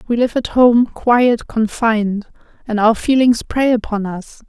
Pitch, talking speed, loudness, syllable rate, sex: 230 Hz, 160 wpm, -15 LUFS, 4.1 syllables/s, female